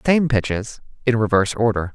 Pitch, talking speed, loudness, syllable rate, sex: 115 Hz, 155 wpm, -20 LUFS, 5.6 syllables/s, male